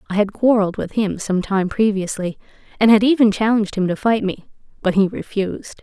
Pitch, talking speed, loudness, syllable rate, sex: 205 Hz, 195 wpm, -18 LUFS, 5.8 syllables/s, female